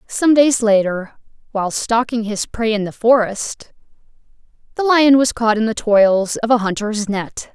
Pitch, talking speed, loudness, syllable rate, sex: 225 Hz, 165 wpm, -16 LUFS, 4.3 syllables/s, female